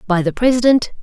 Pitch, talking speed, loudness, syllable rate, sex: 215 Hz, 175 wpm, -15 LUFS, 6.3 syllables/s, female